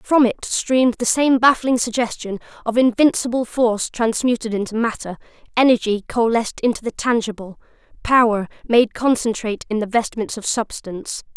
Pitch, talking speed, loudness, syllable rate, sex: 230 Hz, 135 wpm, -19 LUFS, 5.4 syllables/s, female